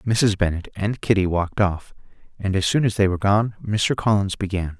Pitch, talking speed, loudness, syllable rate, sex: 100 Hz, 200 wpm, -21 LUFS, 5.3 syllables/s, male